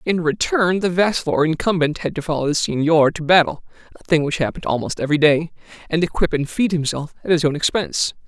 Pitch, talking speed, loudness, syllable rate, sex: 165 Hz, 210 wpm, -19 LUFS, 5.1 syllables/s, male